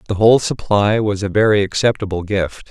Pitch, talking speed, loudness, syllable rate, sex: 105 Hz, 180 wpm, -16 LUFS, 5.6 syllables/s, male